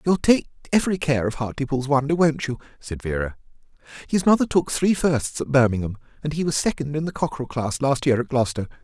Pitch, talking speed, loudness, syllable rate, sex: 140 Hz, 205 wpm, -22 LUFS, 6.1 syllables/s, male